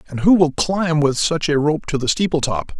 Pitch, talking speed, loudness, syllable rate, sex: 155 Hz, 255 wpm, -18 LUFS, 5.0 syllables/s, male